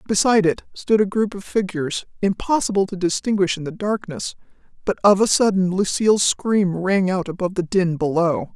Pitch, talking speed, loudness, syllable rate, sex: 190 Hz, 175 wpm, -20 LUFS, 5.4 syllables/s, female